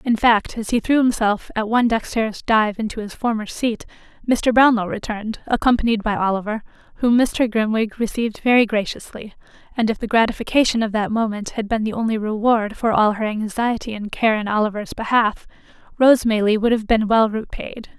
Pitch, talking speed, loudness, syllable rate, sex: 220 Hz, 180 wpm, -19 LUFS, 5.5 syllables/s, female